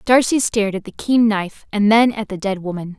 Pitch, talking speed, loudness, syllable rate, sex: 210 Hz, 240 wpm, -18 LUFS, 5.7 syllables/s, female